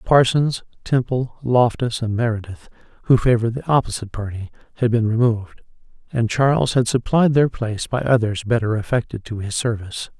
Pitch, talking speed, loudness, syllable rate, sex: 115 Hz, 155 wpm, -20 LUFS, 5.6 syllables/s, male